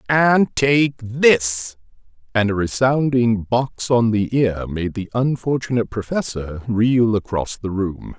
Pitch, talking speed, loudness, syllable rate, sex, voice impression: 115 Hz, 130 wpm, -19 LUFS, 3.7 syllables/s, male, very masculine, very middle-aged, very thick, very tensed, very powerful, very bright, soft, muffled, fluent, slightly raspy, very cool, intellectual, slightly refreshing, sincere, calm, very mature, very friendly, reassuring, very unique, slightly elegant, very wild, sweet, very lively, kind, intense